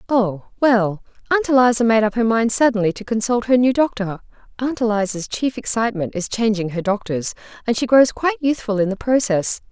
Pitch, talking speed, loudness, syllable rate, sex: 225 Hz, 180 wpm, -19 LUFS, 5.5 syllables/s, female